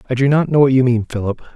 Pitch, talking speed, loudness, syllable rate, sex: 130 Hz, 310 wpm, -15 LUFS, 7.3 syllables/s, male